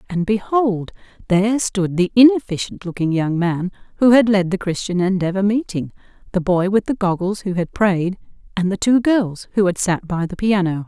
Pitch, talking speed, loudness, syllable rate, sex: 195 Hz, 190 wpm, -18 LUFS, 5.0 syllables/s, female